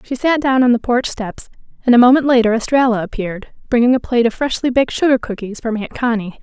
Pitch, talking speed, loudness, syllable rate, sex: 240 Hz, 225 wpm, -16 LUFS, 6.3 syllables/s, female